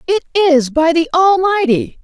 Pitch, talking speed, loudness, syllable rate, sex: 335 Hz, 145 wpm, -13 LUFS, 4.1 syllables/s, female